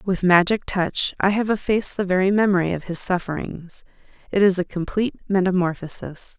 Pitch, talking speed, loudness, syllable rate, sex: 185 Hz, 160 wpm, -21 LUFS, 5.5 syllables/s, female